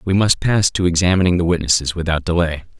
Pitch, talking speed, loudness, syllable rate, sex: 85 Hz, 195 wpm, -17 LUFS, 6.2 syllables/s, male